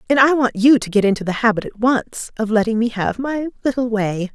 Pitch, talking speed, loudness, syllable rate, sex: 230 Hz, 250 wpm, -18 LUFS, 5.6 syllables/s, female